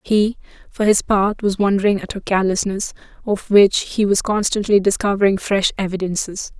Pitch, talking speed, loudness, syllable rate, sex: 200 Hz, 155 wpm, -18 LUFS, 5.0 syllables/s, female